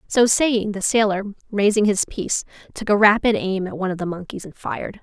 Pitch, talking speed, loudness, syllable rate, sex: 205 Hz, 215 wpm, -20 LUFS, 5.8 syllables/s, female